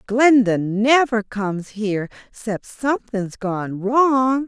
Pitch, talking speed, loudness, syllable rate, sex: 225 Hz, 105 wpm, -19 LUFS, 3.4 syllables/s, female